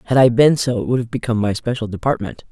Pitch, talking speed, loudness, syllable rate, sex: 115 Hz, 265 wpm, -18 LUFS, 7.0 syllables/s, female